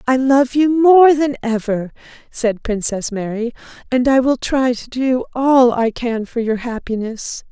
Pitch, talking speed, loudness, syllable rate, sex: 245 Hz, 170 wpm, -16 LUFS, 4.1 syllables/s, female